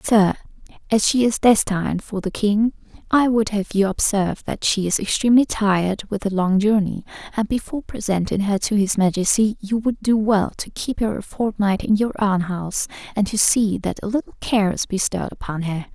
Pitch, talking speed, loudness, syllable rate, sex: 205 Hz, 200 wpm, -20 LUFS, 5.2 syllables/s, female